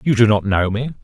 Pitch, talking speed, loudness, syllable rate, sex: 110 Hz, 290 wpm, -17 LUFS, 6.0 syllables/s, male